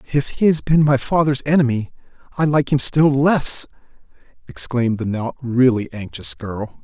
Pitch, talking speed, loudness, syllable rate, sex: 135 Hz, 160 wpm, -18 LUFS, 4.8 syllables/s, male